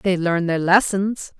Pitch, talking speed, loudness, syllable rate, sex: 185 Hz, 170 wpm, -19 LUFS, 3.8 syllables/s, female